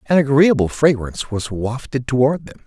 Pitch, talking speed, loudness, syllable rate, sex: 130 Hz, 155 wpm, -18 LUFS, 5.1 syllables/s, male